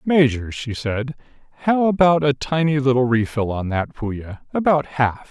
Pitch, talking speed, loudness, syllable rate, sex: 135 Hz, 145 wpm, -20 LUFS, 4.5 syllables/s, male